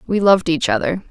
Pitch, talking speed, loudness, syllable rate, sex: 175 Hz, 215 wpm, -16 LUFS, 6.5 syllables/s, female